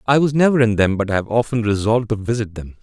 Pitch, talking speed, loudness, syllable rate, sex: 115 Hz, 275 wpm, -18 LUFS, 6.8 syllables/s, male